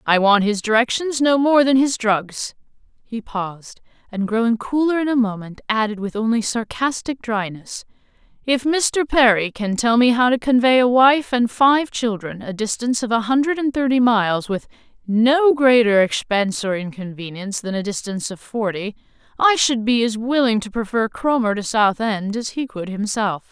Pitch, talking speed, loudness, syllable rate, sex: 230 Hz, 180 wpm, -19 LUFS, 4.9 syllables/s, female